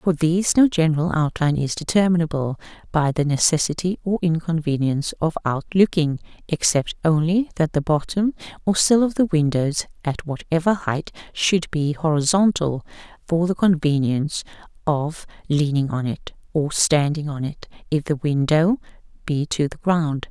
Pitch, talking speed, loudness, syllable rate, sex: 160 Hz, 140 wpm, -21 LUFS, 4.8 syllables/s, female